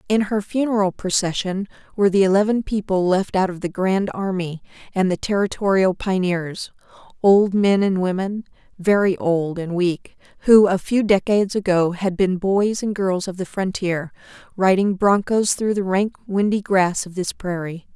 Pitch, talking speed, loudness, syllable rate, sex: 190 Hz, 165 wpm, -20 LUFS, 4.6 syllables/s, female